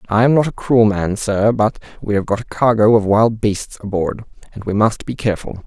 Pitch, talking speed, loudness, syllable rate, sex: 105 Hz, 235 wpm, -17 LUFS, 5.3 syllables/s, male